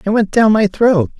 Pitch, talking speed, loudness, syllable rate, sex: 205 Hz, 250 wpm, -13 LUFS, 5.0 syllables/s, male